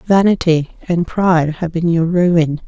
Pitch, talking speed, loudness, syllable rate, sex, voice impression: 170 Hz, 155 wpm, -15 LUFS, 4.1 syllables/s, female, feminine, adult-like, thin, relaxed, weak, soft, muffled, slightly raspy, calm, reassuring, elegant, kind, modest